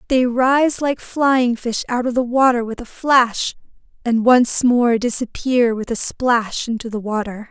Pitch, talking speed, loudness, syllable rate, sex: 240 Hz, 175 wpm, -18 LUFS, 4.0 syllables/s, female